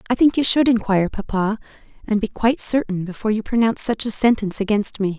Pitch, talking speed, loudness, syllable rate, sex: 215 Hz, 210 wpm, -19 LUFS, 6.6 syllables/s, female